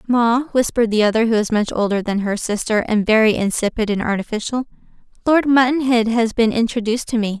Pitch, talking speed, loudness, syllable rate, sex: 225 Hz, 185 wpm, -18 LUFS, 5.9 syllables/s, female